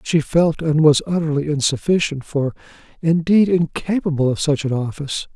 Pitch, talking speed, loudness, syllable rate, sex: 155 Hz, 135 wpm, -18 LUFS, 5.1 syllables/s, male